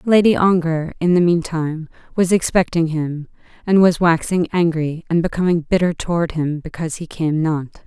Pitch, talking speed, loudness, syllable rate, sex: 165 Hz, 160 wpm, -18 LUFS, 5.2 syllables/s, female